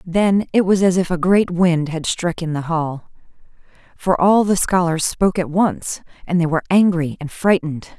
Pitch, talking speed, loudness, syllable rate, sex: 175 Hz, 190 wpm, -18 LUFS, 4.9 syllables/s, female